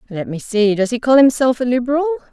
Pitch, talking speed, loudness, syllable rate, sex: 245 Hz, 235 wpm, -16 LUFS, 6.5 syllables/s, female